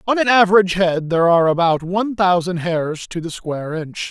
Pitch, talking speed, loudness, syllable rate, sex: 180 Hz, 205 wpm, -17 LUFS, 5.8 syllables/s, male